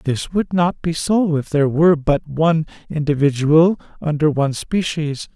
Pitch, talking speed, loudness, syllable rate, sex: 155 Hz, 170 wpm, -18 LUFS, 5.0 syllables/s, male